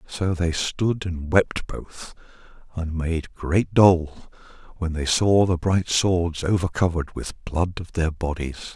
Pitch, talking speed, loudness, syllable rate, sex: 85 Hz, 160 wpm, -23 LUFS, 3.7 syllables/s, male